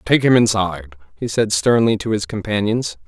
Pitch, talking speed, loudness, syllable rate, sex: 105 Hz, 175 wpm, -17 LUFS, 5.4 syllables/s, male